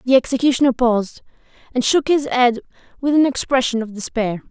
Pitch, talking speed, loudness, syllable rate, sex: 250 Hz, 160 wpm, -18 LUFS, 5.8 syllables/s, female